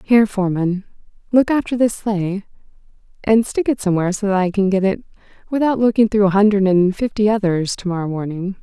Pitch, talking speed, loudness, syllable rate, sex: 200 Hz, 180 wpm, -18 LUFS, 5.8 syllables/s, female